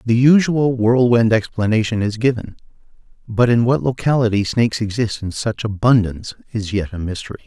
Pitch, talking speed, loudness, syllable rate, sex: 115 Hz, 145 wpm, -17 LUFS, 5.4 syllables/s, male